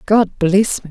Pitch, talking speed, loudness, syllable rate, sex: 195 Hz, 200 wpm, -15 LUFS, 3.8 syllables/s, female